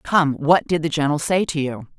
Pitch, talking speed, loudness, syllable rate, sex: 155 Hz, 240 wpm, -20 LUFS, 5.4 syllables/s, female